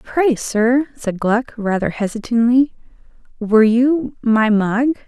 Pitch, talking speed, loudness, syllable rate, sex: 235 Hz, 120 wpm, -17 LUFS, 3.9 syllables/s, female